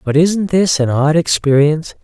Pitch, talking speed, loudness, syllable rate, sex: 155 Hz, 175 wpm, -14 LUFS, 4.8 syllables/s, male